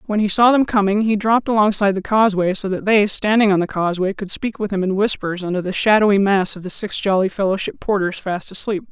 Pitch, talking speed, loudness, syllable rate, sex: 200 Hz, 235 wpm, -18 LUFS, 6.2 syllables/s, female